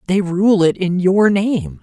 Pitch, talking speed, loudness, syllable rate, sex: 180 Hz, 195 wpm, -15 LUFS, 3.6 syllables/s, male